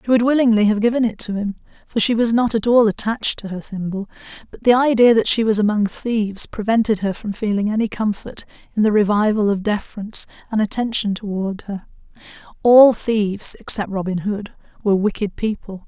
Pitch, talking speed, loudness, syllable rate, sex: 215 Hz, 185 wpm, -18 LUFS, 5.7 syllables/s, female